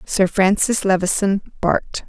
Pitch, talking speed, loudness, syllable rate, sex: 195 Hz, 115 wpm, -18 LUFS, 4.2 syllables/s, female